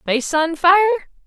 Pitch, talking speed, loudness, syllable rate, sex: 340 Hz, 140 wpm, -16 LUFS, 6.2 syllables/s, female